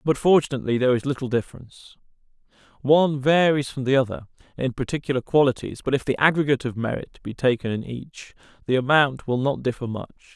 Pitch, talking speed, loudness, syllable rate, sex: 135 Hz, 175 wpm, -22 LUFS, 6.4 syllables/s, male